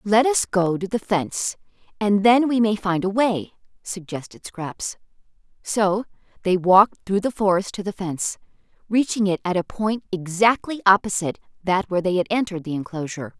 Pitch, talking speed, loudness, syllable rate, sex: 195 Hz, 170 wpm, -22 LUFS, 5.3 syllables/s, female